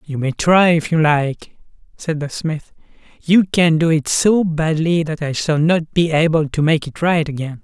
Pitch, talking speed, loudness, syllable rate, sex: 160 Hz, 205 wpm, -16 LUFS, 4.4 syllables/s, male